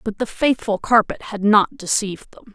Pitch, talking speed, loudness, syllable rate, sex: 210 Hz, 190 wpm, -19 LUFS, 5.1 syllables/s, female